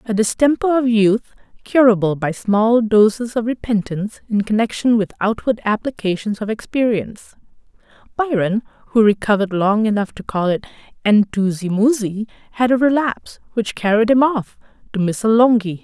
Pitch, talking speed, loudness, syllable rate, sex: 215 Hz, 135 wpm, -17 LUFS, 5.2 syllables/s, female